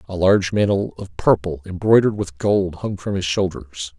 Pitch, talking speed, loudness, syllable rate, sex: 95 Hz, 180 wpm, -20 LUFS, 5.2 syllables/s, male